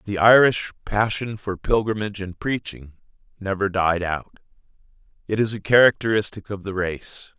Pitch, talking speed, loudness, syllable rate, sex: 100 Hz, 140 wpm, -21 LUFS, 4.8 syllables/s, male